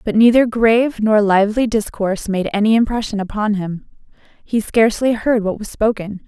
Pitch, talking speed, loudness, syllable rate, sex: 215 Hz, 165 wpm, -16 LUFS, 5.3 syllables/s, female